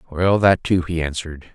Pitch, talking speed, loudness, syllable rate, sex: 85 Hz, 195 wpm, -19 LUFS, 5.7 syllables/s, male